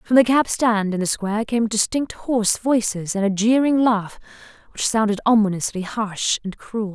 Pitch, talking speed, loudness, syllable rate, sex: 220 Hz, 180 wpm, -20 LUFS, 4.8 syllables/s, female